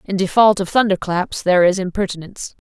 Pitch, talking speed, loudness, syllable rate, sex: 190 Hz, 160 wpm, -17 LUFS, 6.0 syllables/s, female